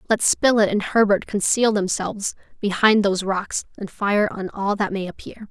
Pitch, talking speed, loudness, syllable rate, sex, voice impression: 205 Hz, 175 wpm, -20 LUFS, 4.9 syllables/s, female, feminine, slightly young, bright, clear, fluent, intellectual, friendly, slightly elegant, slightly strict